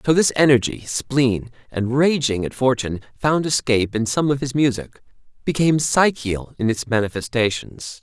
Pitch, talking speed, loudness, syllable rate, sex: 130 Hz, 150 wpm, -20 LUFS, 5.1 syllables/s, male